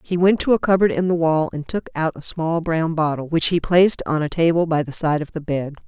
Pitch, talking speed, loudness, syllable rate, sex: 165 Hz, 275 wpm, -19 LUFS, 5.6 syllables/s, female